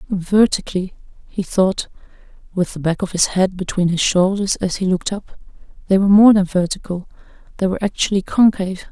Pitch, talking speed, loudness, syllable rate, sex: 190 Hz, 150 wpm, -17 LUFS, 5.8 syllables/s, female